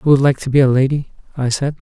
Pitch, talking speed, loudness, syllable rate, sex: 135 Hz, 290 wpm, -16 LUFS, 6.8 syllables/s, male